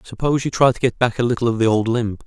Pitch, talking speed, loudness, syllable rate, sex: 120 Hz, 320 wpm, -19 LUFS, 6.9 syllables/s, male